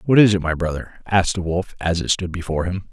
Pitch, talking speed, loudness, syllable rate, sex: 90 Hz, 265 wpm, -20 LUFS, 6.1 syllables/s, male